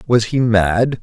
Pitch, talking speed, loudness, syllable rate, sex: 115 Hz, 175 wpm, -15 LUFS, 3.4 syllables/s, male